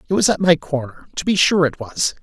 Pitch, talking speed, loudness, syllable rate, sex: 160 Hz, 270 wpm, -18 LUFS, 5.7 syllables/s, male